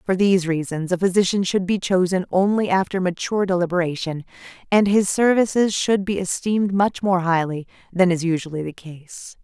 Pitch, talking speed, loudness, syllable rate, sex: 185 Hz, 165 wpm, -20 LUFS, 5.4 syllables/s, female